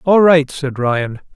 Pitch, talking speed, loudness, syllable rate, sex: 145 Hz, 175 wpm, -15 LUFS, 3.6 syllables/s, male